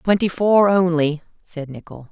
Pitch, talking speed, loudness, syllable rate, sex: 170 Hz, 140 wpm, -17 LUFS, 4.3 syllables/s, female